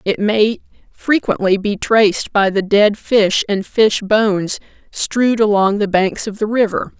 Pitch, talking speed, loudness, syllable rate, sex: 210 Hz, 165 wpm, -15 LUFS, 4.2 syllables/s, female